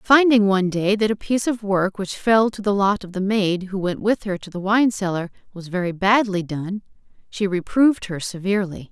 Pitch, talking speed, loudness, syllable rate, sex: 200 Hz, 215 wpm, -20 LUFS, 5.3 syllables/s, female